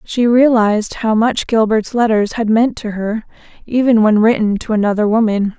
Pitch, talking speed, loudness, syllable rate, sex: 220 Hz, 170 wpm, -14 LUFS, 4.9 syllables/s, female